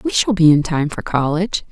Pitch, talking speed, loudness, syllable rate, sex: 175 Hz, 245 wpm, -16 LUFS, 5.7 syllables/s, female